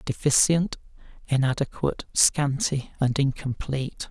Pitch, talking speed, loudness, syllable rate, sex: 140 Hz, 75 wpm, -24 LUFS, 4.5 syllables/s, male